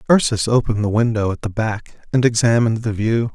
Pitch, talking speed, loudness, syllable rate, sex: 110 Hz, 195 wpm, -18 LUFS, 5.9 syllables/s, male